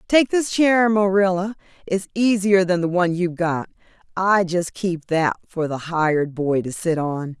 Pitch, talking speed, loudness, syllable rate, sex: 180 Hz, 180 wpm, -20 LUFS, 4.5 syllables/s, female